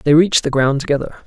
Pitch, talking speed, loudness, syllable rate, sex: 150 Hz, 235 wpm, -16 LUFS, 6.6 syllables/s, male